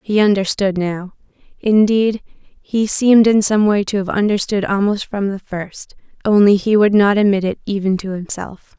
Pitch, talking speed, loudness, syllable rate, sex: 200 Hz, 170 wpm, -16 LUFS, 4.6 syllables/s, female